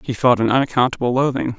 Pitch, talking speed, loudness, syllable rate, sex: 125 Hz, 190 wpm, -18 LUFS, 6.7 syllables/s, male